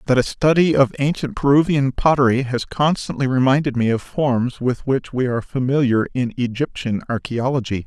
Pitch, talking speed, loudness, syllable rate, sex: 130 Hz, 160 wpm, -19 LUFS, 5.2 syllables/s, male